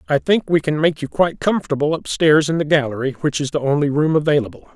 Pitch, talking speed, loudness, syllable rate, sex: 150 Hz, 225 wpm, -18 LUFS, 6.4 syllables/s, male